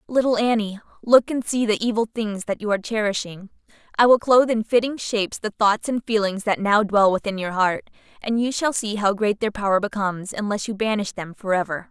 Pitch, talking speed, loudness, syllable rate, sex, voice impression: 215 Hz, 215 wpm, -21 LUFS, 5.7 syllables/s, female, very feminine, very young, slightly adult-like, very thin, tensed, slightly powerful, very bright, hard, very clear, very fluent, slightly raspy, very cute, slightly intellectual, very refreshing, sincere, slightly calm, very friendly, very reassuring, very unique, slightly elegant, wild, slightly sweet, very lively, strict, slightly intense, sharp, very light